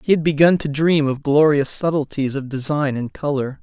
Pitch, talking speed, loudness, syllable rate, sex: 145 Hz, 200 wpm, -18 LUFS, 5.1 syllables/s, male